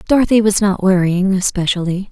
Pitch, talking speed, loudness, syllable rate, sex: 195 Hz, 140 wpm, -15 LUFS, 5.7 syllables/s, female